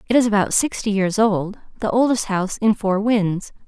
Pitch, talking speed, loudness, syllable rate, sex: 205 Hz, 180 wpm, -19 LUFS, 5.1 syllables/s, female